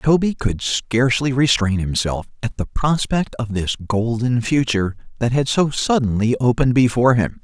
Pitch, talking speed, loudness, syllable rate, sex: 120 Hz, 155 wpm, -19 LUFS, 4.9 syllables/s, male